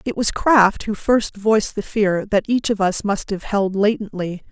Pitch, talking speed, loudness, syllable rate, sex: 205 Hz, 215 wpm, -19 LUFS, 4.4 syllables/s, female